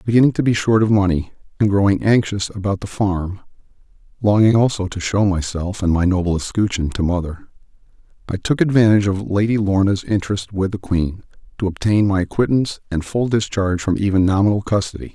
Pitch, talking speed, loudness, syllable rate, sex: 100 Hz, 175 wpm, -18 LUFS, 5.9 syllables/s, male